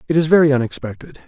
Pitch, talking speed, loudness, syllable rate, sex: 135 Hz, 190 wpm, -15 LUFS, 7.8 syllables/s, male